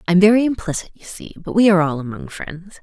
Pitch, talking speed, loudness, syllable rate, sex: 185 Hz, 255 wpm, -17 LUFS, 6.5 syllables/s, female